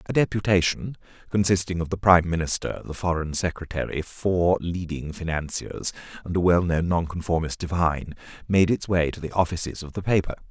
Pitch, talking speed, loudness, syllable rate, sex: 85 Hz, 155 wpm, -24 LUFS, 5.5 syllables/s, male